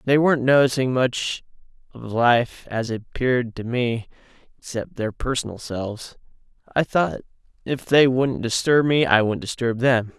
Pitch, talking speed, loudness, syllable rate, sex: 125 Hz, 155 wpm, -21 LUFS, 4.7 syllables/s, male